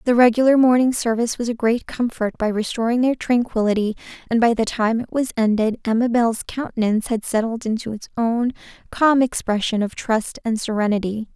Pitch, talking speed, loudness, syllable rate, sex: 230 Hz, 170 wpm, -20 LUFS, 5.5 syllables/s, female